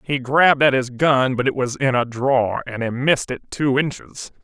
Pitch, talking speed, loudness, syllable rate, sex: 130 Hz, 230 wpm, -19 LUFS, 5.1 syllables/s, male